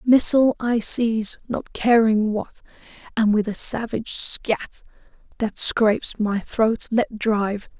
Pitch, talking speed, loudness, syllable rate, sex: 220 Hz, 130 wpm, -21 LUFS, 3.9 syllables/s, female